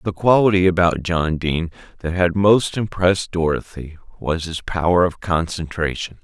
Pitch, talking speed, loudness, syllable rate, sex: 85 Hz, 145 wpm, -19 LUFS, 4.9 syllables/s, male